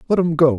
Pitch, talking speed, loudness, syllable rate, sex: 155 Hz, 310 wpm, -17 LUFS, 6.5 syllables/s, male